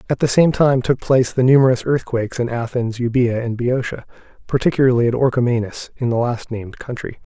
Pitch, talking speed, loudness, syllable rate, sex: 125 Hz, 180 wpm, -18 LUFS, 6.0 syllables/s, male